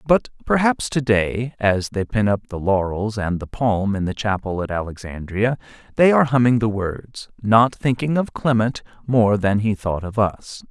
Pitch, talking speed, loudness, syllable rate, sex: 110 Hz, 185 wpm, -20 LUFS, 4.5 syllables/s, male